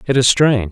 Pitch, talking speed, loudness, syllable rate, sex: 120 Hz, 250 wpm, -13 LUFS, 6.5 syllables/s, male